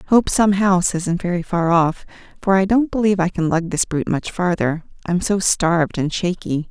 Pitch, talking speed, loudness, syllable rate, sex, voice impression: 180 Hz, 205 wpm, -19 LUFS, 5.1 syllables/s, female, feminine, adult-like, tensed, powerful, bright, clear, fluent, intellectual, calm, reassuring, elegant, kind